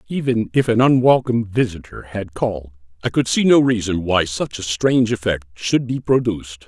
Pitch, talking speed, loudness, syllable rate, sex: 110 Hz, 180 wpm, -18 LUFS, 5.3 syllables/s, male